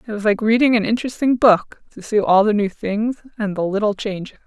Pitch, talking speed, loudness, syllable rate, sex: 215 Hz, 230 wpm, -18 LUFS, 5.6 syllables/s, female